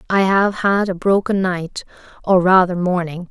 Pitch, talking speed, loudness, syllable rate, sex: 185 Hz, 165 wpm, -17 LUFS, 4.4 syllables/s, female